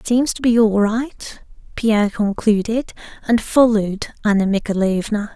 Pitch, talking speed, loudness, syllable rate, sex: 215 Hz, 135 wpm, -18 LUFS, 4.6 syllables/s, female